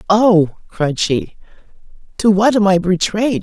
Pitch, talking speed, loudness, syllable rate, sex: 195 Hz, 140 wpm, -15 LUFS, 3.9 syllables/s, female